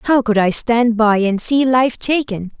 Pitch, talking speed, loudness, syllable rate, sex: 235 Hz, 210 wpm, -15 LUFS, 4.0 syllables/s, female